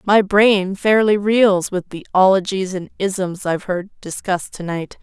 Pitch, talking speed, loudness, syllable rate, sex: 190 Hz, 155 wpm, -18 LUFS, 4.5 syllables/s, female